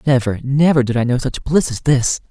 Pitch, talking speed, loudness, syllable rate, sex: 130 Hz, 235 wpm, -16 LUFS, 5.3 syllables/s, male